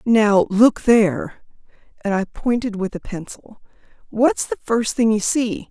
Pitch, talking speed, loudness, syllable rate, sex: 220 Hz, 160 wpm, -19 LUFS, 4.1 syllables/s, female